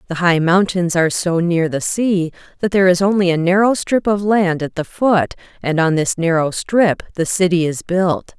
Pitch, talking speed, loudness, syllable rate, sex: 180 Hz, 210 wpm, -16 LUFS, 4.8 syllables/s, female